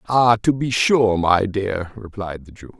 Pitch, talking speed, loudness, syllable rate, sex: 105 Hz, 195 wpm, -18 LUFS, 3.9 syllables/s, male